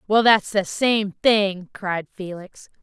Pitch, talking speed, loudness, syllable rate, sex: 200 Hz, 150 wpm, -20 LUFS, 3.2 syllables/s, female